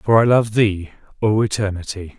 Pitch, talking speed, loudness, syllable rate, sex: 105 Hz, 165 wpm, -18 LUFS, 4.9 syllables/s, male